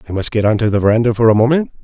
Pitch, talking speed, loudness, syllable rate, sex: 115 Hz, 295 wpm, -14 LUFS, 8.2 syllables/s, male